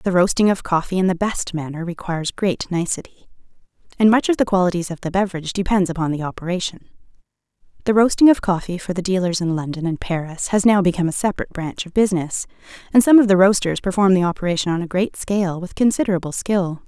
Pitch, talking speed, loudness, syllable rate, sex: 185 Hz, 205 wpm, -19 LUFS, 6.6 syllables/s, female